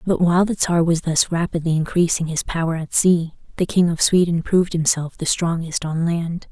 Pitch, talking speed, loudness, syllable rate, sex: 170 Hz, 205 wpm, -19 LUFS, 5.2 syllables/s, female